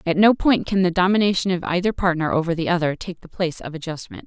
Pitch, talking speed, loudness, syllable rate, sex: 175 Hz, 240 wpm, -20 LUFS, 6.5 syllables/s, female